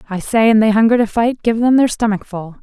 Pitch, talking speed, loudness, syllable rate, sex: 220 Hz, 250 wpm, -14 LUFS, 5.8 syllables/s, female